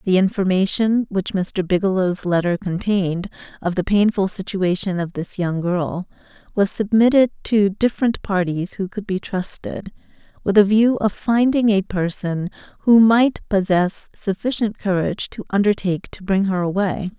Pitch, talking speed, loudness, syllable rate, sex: 195 Hz, 145 wpm, -19 LUFS, 4.6 syllables/s, female